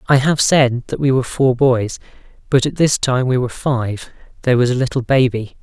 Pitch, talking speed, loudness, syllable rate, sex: 130 Hz, 205 wpm, -16 LUFS, 5.5 syllables/s, male